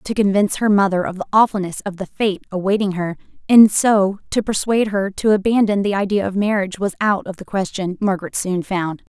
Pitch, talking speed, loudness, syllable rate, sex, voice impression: 195 Hz, 200 wpm, -18 LUFS, 5.8 syllables/s, female, feminine, adult-like, tensed, powerful, bright, clear, intellectual, friendly, elegant, lively, slightly sharp